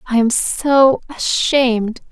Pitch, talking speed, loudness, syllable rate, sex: 250 Hz, 85 wpm, -15 LUFS, 3.4 syllables/s, female